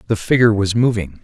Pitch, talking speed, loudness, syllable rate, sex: 105 Hz, 195 wpm, -16 LUFS, 6.7 syllables/s, male